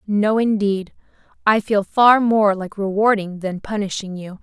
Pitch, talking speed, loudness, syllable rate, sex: 205 Hz, 150 wpm, -18 LUFS, 4.2 syllables/s, female